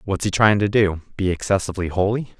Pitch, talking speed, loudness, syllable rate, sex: 100 Hz, 175 wpm, -20 LUFS, 6.2 syllables/s, male